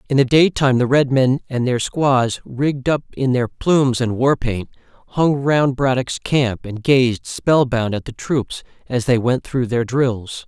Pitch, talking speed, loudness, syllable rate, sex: 130 Hz, 205 wpm, -18 LUFS, 4.1 syllables/s, male